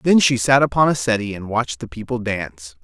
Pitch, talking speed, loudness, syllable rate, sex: 115 Hz, 235 wpm, -19 LUFS, 5.8 syllables/s, male